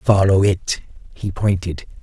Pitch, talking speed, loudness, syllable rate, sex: 95 Hz, 120 wpm, -19 LUFS, 3.9 syllables/s, male